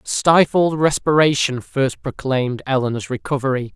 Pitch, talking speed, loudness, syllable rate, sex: 135 Hz, 95 wpm, -18 LUFS, 4.7 syllables/s, male